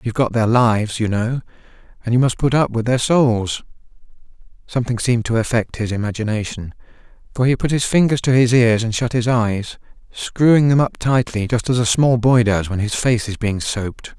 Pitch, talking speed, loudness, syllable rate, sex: 120 Hz, 205 wpm, -18 LUFS, 5.4 syllables/s, male